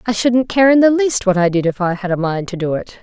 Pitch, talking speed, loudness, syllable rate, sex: 210 Hz, 335 wpm, -15 LUFS, 5.9 syllables/s, female